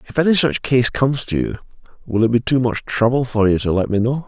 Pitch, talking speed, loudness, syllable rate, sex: 125 Hz, 265 wpm, -18 LUFS, 6.1 syllables/s, male